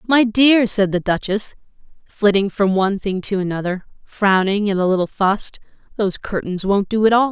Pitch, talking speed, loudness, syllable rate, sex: 200 Hz, 180 wpm, -18 LUFS, 5.2 syllables/s, female